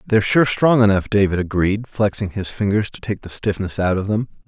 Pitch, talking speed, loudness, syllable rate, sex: 100 Hz, 215 wpm, -19 LUFS, 5.5 syllables/s, male